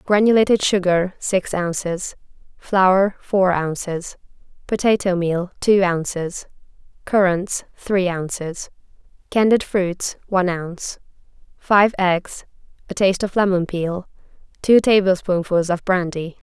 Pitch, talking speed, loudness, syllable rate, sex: 185 Hz, 105 wpm, -19 LUFS, 4.0 syllables/s, female